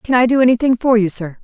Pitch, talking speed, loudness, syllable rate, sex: 235 Hz, 295 wpm, -14 LUFS, 6.5 syllables/s, female